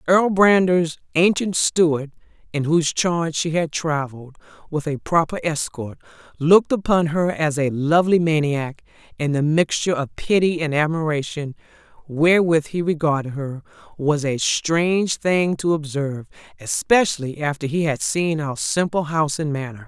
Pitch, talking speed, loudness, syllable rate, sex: 160 Hz, 145 wpm, -20 LUFS, 4.9 syllables/s, female